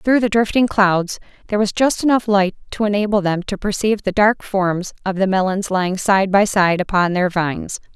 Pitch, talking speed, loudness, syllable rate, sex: 200 Hz, 205 wpm, -17 LUFS, 5.3 syllables/s, female